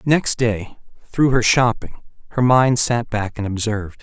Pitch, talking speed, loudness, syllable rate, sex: 115 Hz, 165 wpm, -18 LUFS, 4.3 syllables/s, male